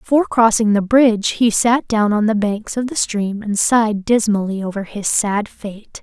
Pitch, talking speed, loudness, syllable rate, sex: 215 Hz, 200 wpm, -16 LUFS, 4.7 syllables/s, female